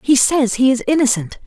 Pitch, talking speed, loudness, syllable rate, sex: 260 Hz, 205 wpm, -15 LUFS, 5.3 syllables/s, female